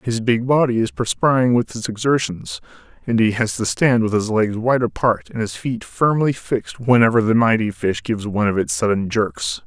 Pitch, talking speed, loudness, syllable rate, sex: 110 Hz, 205 wpm, -19 LUFS, 5.2 syllables/s, male